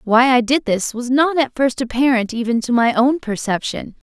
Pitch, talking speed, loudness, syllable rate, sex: 250 Hz, 205 wpm, -17 LUFS, 4.9 syllables/s, female